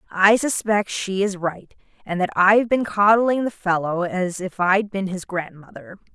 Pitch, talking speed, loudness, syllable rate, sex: 190 Hz, 175 wpm, -20 LUFS, 4.4 syllables/s, female